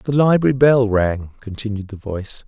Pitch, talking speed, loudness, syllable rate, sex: 115 Hz, 170 wpm, -18 LUFS, 5.0 syllables/s, male